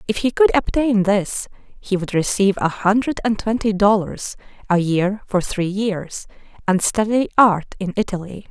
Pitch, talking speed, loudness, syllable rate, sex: 205 Hz, 160 wpm, -19 LUFS, 4.4 syllables/s, female